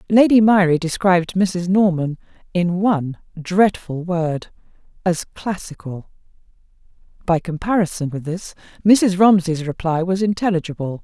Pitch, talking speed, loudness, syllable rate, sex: 180 Hz, 110 wpm, -18 LUFS, 4.6 syllables/s, female